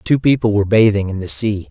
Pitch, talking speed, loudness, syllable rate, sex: 105 Hz, 245 wpm, -15 LUFS, 6.2 syllables/s, male